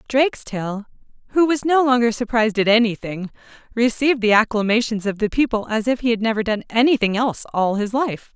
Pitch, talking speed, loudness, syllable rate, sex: 230 Hz, 180 wpm, -19 LUFS, 5.9 syllables/s, female